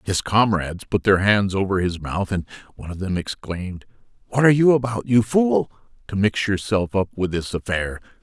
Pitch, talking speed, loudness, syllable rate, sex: 100 Hz, 190 wpm, -21 LUFS, 5.3 syllables/s, male